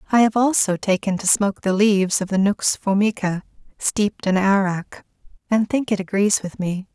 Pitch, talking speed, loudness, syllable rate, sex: 200 Hz, 180 wpm, -20 LUFS, 5.3 syllables/s, female